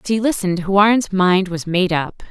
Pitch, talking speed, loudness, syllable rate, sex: 190 Hz, 210 wpm, -17 LUFS, 4.7 syllables/s, female